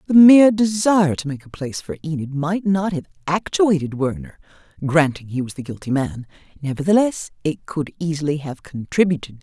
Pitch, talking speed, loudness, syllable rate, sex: 160 Hz, 165 wpm, -19 LUFS, 5.5 syllables/s, female